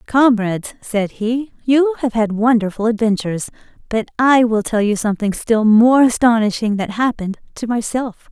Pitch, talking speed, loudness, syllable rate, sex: 225 Hz, 150 wpm, -16 LUFS, 4.9 syllables/s, female